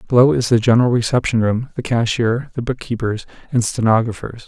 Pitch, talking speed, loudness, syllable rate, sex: 120 Hz, 160 wpm, -17 LUFS, 5.8 syllables/s, male